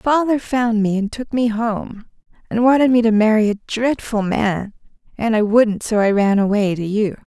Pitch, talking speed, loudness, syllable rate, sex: 220 Hz, 195 wpm, -17 LUFS, 4.6 syllables/s, female